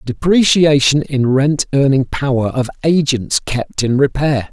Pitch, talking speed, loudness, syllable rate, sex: 135 Hz, 135 wpm, -14 LUFS, 4.1 syllables/s, male